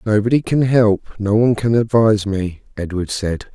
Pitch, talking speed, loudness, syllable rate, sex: 105 Hz, 170 wpm, -17 LUFS, 5.3 syllables/s, male